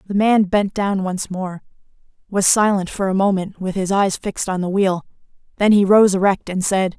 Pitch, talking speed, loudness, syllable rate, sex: 195 Hz, 205 wpm, -18 LUFS, 5.0 syllables/s, female